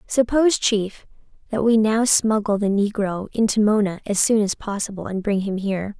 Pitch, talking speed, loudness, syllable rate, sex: 210 Hz, 180 wpm, -20 LUFS, 5.1 syllables/s, female